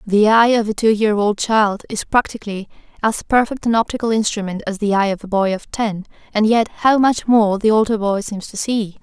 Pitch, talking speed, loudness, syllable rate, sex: 215 Hz, 225 wpm, -17 LUFS, 5.3 syllables/s, female